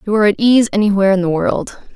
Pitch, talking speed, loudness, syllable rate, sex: 205 Hz, 245 wpm, -14 LUFS, 7.3 syllables/s, female